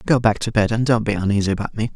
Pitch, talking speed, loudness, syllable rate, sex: 110 Hz, 310 wpm, -19 LUFS, 7.1 syllables/s, male